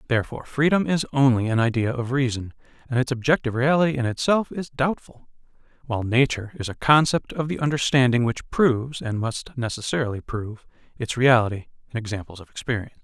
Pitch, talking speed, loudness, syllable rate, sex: 125 Hz, 165 wpm, -23 LUFS, 6.3 syllables/s, male